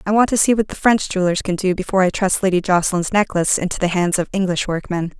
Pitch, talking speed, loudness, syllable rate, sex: 185 Hz, 255 wpm, -18 LUFS, 6.8 syllables/s, female